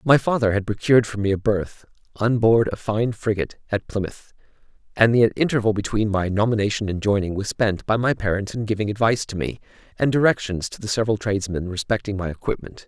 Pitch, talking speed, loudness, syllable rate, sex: 105 Hz, 195 wpm, -22 LUFS, 6.1 syllables/s, male